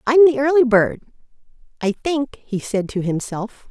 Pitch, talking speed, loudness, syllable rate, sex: 245 Hz, 160 wpm, -19 LUFS, 4.5 syllables/s, female